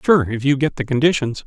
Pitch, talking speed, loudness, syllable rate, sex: 135 Hz, 245 wpm, -18 LUFS, 5.8 syllables/s, male